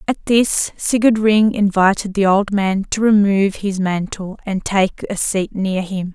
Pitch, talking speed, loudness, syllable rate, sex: 200 Hz, 175 wpm, -17 LUFS, 4.1 syllables/s, female